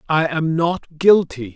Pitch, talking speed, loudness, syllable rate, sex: 160 Hz, 155 wpm, -17 LUFS, 3.7 syllables/s, male